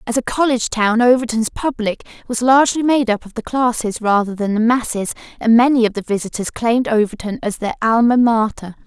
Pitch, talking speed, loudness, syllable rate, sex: 230 Hz, 190 wpm, -17 LUFS, 5.8 syllables/s, female